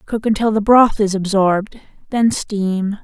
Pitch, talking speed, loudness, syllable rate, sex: 205 Hz, 160 wpm, -16 LUFS, 4.2 syllables/s, female